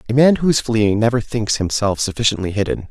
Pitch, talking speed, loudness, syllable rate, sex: 115 Hz, 205 wpm, -17 LUFS, 5.9 syllables/s, male